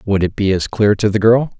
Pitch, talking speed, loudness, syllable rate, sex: 105 Hz, 300 wpm, -15 LUFS, 5.6 syllables/s, male